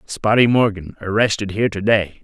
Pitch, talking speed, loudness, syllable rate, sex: 105 Hz, 160 wpm, -17 LUFS, 5.5 syllables/s, male